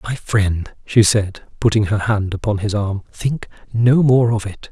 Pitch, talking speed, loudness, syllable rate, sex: 105 Hz, 190 wpm, -18 LUFS, 4.2 syllables/s, male